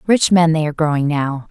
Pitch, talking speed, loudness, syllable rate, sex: 160 Hz, 240 wpm, -16 LUFS, 5.9 syllables/s, female